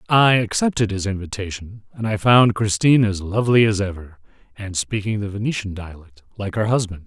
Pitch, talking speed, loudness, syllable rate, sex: 105 Hz, 170 wpm, -19 LUFS, 5.6 syllables/s, male